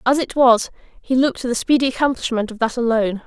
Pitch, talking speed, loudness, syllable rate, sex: 245 Hz, 220 wpm, -18 LUFS, 6.3 syllables/s, female